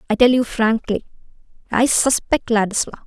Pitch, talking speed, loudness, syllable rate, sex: 230 Hz, 135 wpm, -18 LUFS, 5.2 syllables/s, female